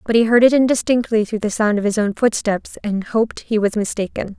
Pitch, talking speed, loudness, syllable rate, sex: 220 Hz, 235 wpm, -18 LUFS, 5.8 syllables/s, female